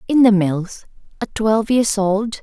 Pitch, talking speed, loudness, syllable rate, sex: 210 Hz, 150 wpm, -17 LUFS, 4.3 syllables/s, female